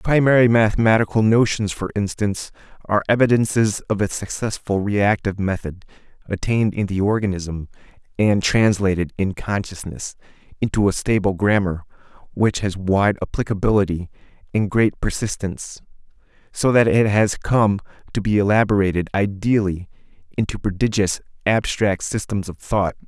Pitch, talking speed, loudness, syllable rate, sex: 100 Hz, 120 wpm, -20 LUFS, 5.1 syllables/s, male